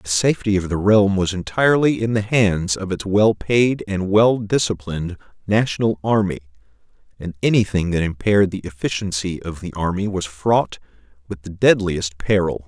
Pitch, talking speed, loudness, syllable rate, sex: 95 Hz, 160 wpm, -19 LUFS, 5.1 syllables/s, male